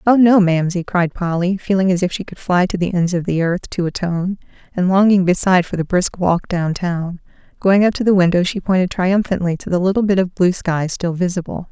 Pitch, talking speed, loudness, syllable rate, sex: 180 Hz, 230 wpm, -17 LUFS, 5.5 syllables/s, female